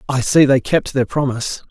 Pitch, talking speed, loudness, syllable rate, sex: 130 Hz, 210 wpm, -16 LUFS, 5.4 syllables/s, male